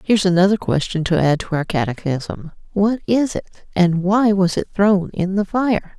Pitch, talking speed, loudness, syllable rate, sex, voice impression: 190 Hz, 190 wpm, -18 LUFS, 4.8 syllables/s, female, slightly masculine, adult-like, slightly dark, slightly calm, unique